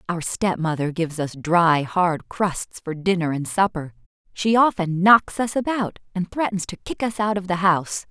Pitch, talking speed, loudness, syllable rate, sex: 180 Hz, 185 wpm, -21 LUFS, 4.7 syllables/s, female